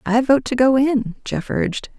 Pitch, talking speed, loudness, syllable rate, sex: 245 Hz, 210 wpm, -18 LUFS, 4.5 syllables/s, female